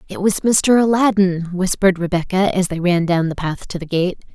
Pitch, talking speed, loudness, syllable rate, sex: 180 Hz, 205 wpm, -17 LUFS, 5.2 syllables/s, female